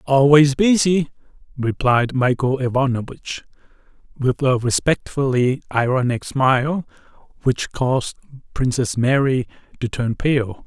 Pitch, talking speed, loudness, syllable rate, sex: 130 Hz, 95 wpm, -19 LUFS, 4.1 syllables/s, male